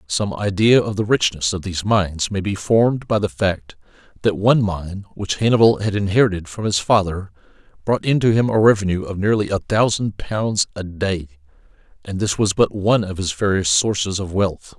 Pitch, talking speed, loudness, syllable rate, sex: 100 Hz, 195 wpm, -19 LUFS, 5.3 syllables/s, male